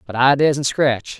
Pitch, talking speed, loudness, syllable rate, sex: 135 Hz, 200 wpm, -17 LUFS, 3.6 syllables/s, male